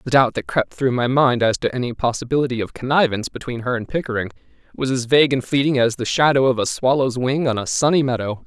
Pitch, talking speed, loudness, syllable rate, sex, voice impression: 125 Hz, 235 wpm, -19 LUFS, 6.3 syllables/s, male, masculine, adult-like, tensed, powerful, bright, clear, fluent, cool, slightly refreshing, friendly, wild, lively, slightly kind, intense